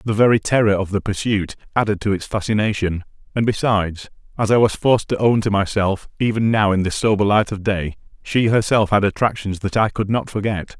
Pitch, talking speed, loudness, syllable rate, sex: 105 Hz, 205 wpm, -19 LUFS, 5.7 syllables/s, male